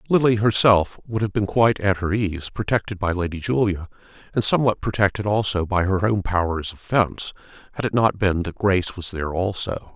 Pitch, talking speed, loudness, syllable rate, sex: 100 Hz, 195 wpm, -21 LUFS, 5.5 syllables/s, male